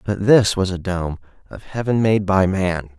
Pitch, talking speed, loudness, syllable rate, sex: 95 Hz, 200 wpm, -18 LUFS, 4.4 syllables/s, male